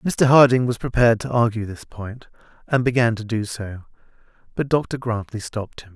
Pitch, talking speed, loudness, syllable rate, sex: 115 Hz, 180 wpm, -20 LUFS, 5.1 syllables/s, male